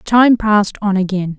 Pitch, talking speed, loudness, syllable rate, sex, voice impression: 205 Hz, 175 wpm, -14 LUFS, 4.4 syllables/s, female, feminine, adult-like, slightly middle-aged, slightly relaxed, slightly weak, slightly bright, slightly hard, muffled, slightly fluent, slightly cute, intellectual, slightly refreshing, sincere, slightly calm, slightly friendly, slightly reassuring, elegant, slightly sweet, kind, very modest